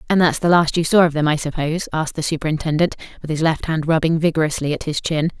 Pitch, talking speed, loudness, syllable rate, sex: 160 Hz, 245 wpm, -19 LUFS, 6.8 syllables/s, female